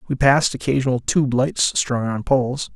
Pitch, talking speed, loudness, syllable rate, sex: 130 Hz, 175 wpm, -19 LUFS, 5.1 syllables/s, male